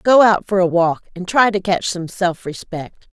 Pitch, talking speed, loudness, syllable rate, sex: 185 Hz, 230 wpm, -17 LUFS, 4.4 syllables/s, female